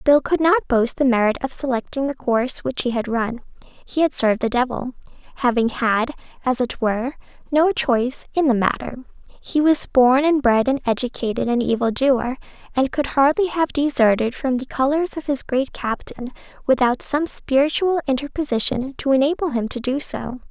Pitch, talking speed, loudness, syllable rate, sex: 260 Hz, 180 wpm, -20 LUFS, 5.1 syllables/s, female